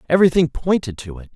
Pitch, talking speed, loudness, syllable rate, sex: 145 Hz, 175 wpm, -17 LUFS, 7.0 syllables/s, male